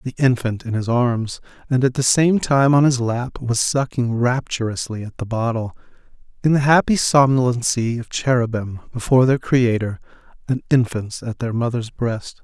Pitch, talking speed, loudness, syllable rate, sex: 120 Hz, 165 wpm, -19 LUFS, 4.8 syllables/s, male